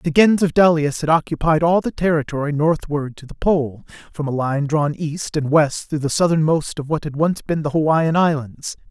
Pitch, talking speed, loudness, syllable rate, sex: 155 Hz, 210 wpm, -19 LUFS, 5.0 syllables/s, male